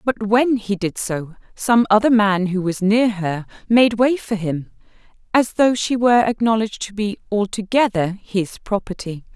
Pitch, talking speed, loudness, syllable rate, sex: 210 Hz, 165 wpm, -19 LUFS, 4.5 syllables/s, female